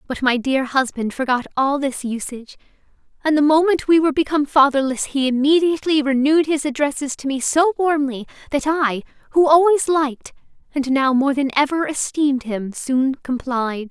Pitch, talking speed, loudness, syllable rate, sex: 280 Hz, 165 wpm, -18 LUFS, 5.3 syllables/s, female